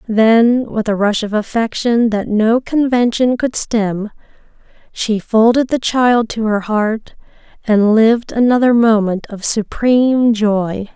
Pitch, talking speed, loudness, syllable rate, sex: 225 Hz, 135 wpm, -14 LUFS, 3.8 syllables/s, female